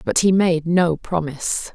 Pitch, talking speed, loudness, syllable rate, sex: 165 Hz, 170 wpm, -19 LUFS, 4.2 syllables/s, female